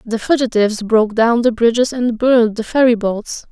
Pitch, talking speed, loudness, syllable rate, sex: 230 Hz, 170 wpm, -15 LUFS, 5.3 syllables/s, female